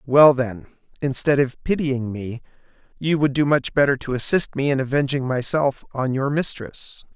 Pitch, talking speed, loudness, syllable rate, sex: 135 Hz, 170 wpm, -21 LUFS, 4.7 syllables/s, male